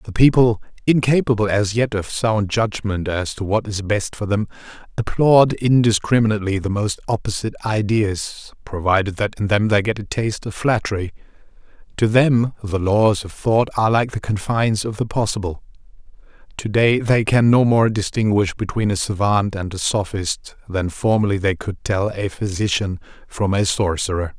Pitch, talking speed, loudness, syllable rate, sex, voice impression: 105 Hz, 165 wpm, -19 LUFS, 5.0 syllables/s, male, masculine, adult-like, tensed, powerful, slightly hard, slightly muffled, halting, cool, intellectual, calm, mature, reassuring, wild, lively, slightly strict